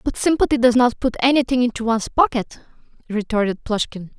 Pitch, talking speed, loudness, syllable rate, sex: 240 Hz, 160 wpm, -19 LUFS, 5.9 syllables/s, female